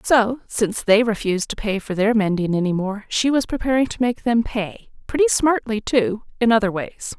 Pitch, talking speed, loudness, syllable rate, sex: 220 Hz, 200 wpm, -20 LUFS, 5.1 syllables/s, female